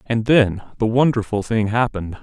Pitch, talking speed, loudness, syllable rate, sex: 115 Hz, 160 wpm, -19 LUFS, 5.2 syllables/s, male